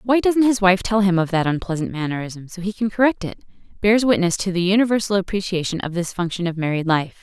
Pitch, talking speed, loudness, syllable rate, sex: 190 Hz, 225 wpm, -20 LUFS, 6.2 syllables/s, female